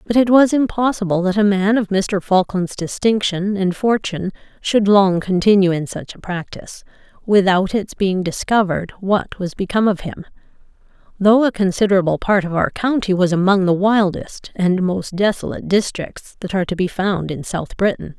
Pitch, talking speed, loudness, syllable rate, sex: 195 Hz, 170 wpm, -17 LUFS, 5.1 syllables/s, female